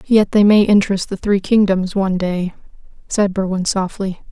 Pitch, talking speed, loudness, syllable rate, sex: 195 Hz, 165 wpm, -16 LUFS, 5.0 syllables/s, female